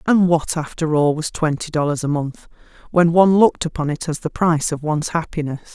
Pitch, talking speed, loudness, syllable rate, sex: 160 Hz, 210 wpm, -19 LUFS, 5.8 syllables/s, female